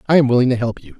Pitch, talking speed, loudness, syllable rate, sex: 130 Hz, 365 wpm, -16 LUFS, 8.6 syllables/s, male